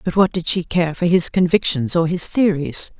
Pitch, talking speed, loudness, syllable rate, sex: 175 Hz, 220 wpm, -18 LUFS, 4.9 syllables/s, female